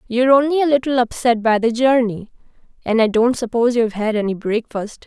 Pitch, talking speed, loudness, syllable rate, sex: 235 Hz, 190 wpm, -17 LUFS, 5.9 syllables/s, female